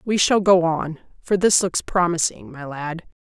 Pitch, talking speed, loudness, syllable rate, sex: 175 Hz, 185 wpm, -20 LUFS, 4.3 syllables/s, female